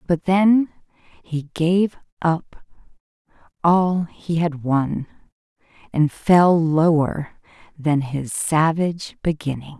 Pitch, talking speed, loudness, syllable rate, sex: 160 Hz, 100 wpm, -20 LUFS, 3.1 syllables/s, female